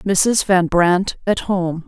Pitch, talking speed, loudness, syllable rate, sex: 185 Hz, 160 wpm, -17 LUFS, 2.8 syllables/s, female